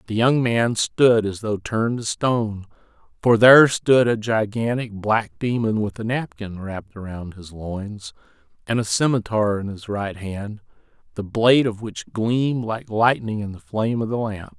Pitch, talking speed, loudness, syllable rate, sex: 110 Hz, 175 wpm, -21 LUFS, 4.6 syllables/s, male